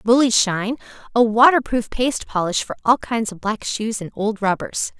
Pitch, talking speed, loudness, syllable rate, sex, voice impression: 225 Hz, 180 wpm, -19 LUFS, 5.1 syllables/s, female, very feminine, very middle-aged, very thin, very tensed, very powerful, very bright, very hard, very clear, very fluent, raspy, slightly cool, slightly intellectual, refreshing, slightly sincere, slightly calm, slightly friendly, slightly reassuring, very unique, slightly elegant, wild, slightly sweet, very lively, very strict, very intense, very sharp, very light